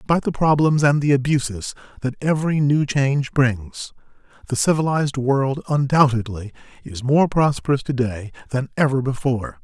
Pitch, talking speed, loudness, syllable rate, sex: 135 Hz, 145 wpm, -20 LUFS, 5.3 syllables/s, male